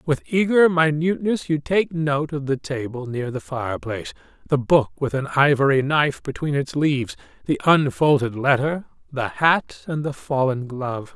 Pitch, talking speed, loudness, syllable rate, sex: 145 Hz, 160 wpm, -21 LUFS, 4.9 syllables/s, male